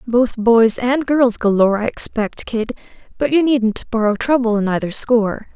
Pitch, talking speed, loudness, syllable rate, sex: 235 Hz, 175 wpm, -17 LUFS, 4.7 syllables/s, female